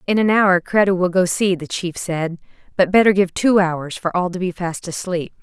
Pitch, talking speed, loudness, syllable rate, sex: 180 Hz, 230 wpm, -18 LUFS, 5.0 syllables/s, female